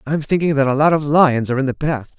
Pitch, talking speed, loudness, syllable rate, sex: 145 Hz, 305 wpm, -17 LUFS, 6.3 syllables/s, male